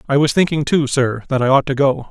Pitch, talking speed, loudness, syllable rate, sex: 135 Hz, 285 wpm, -16 LUFS, 5.9 syllables/s, male